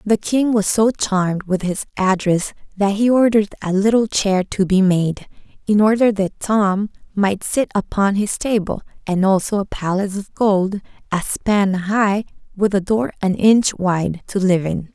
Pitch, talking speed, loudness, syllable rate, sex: 200 Hz, 175 wpm, -18 LUFS, 4.3 syllables/s, female